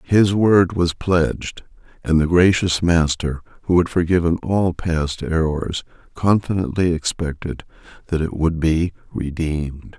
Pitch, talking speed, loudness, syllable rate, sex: 85 Hz, 125 wpm, -19 LUFS, 4.1 syllables/s, male